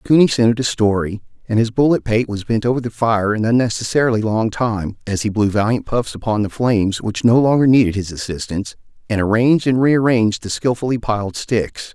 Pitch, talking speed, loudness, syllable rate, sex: 115 Hz, 195 wpm, -17 LUFS, 5.7 syllables/s, male